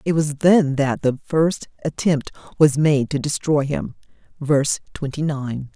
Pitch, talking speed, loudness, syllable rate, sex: 145 Hz, 155 wpm, -20 LUFS, 3.6 syllables/s, female